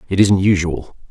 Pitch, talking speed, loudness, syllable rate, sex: 95 Hz, 165 wpm, -16 LUFS, 4.9 syllables/s, male